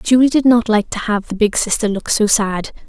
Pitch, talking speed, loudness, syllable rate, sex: 220 Hz, 250 wpm, -15 LUFS, 5.2 syllables/s, female